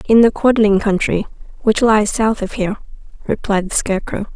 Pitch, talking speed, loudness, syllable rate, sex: 210 Hz, 165 wpm, -16 LUFS, 5.4 syllables/s, female